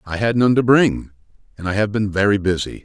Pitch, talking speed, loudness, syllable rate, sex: 105 Hz, 230 wpm, -17 LUFS, 5.8 syllables/s, male